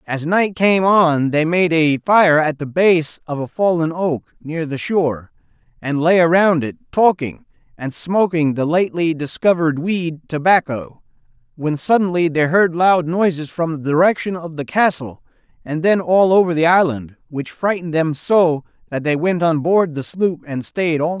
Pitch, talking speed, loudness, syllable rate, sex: 165 Hz, 180 wpm, -17 LUFS, 4.5 syllables/s, male